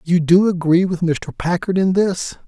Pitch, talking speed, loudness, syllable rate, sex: 180 Hz, 195 wpm, -17 LUFS, 4.3 syllables/s, male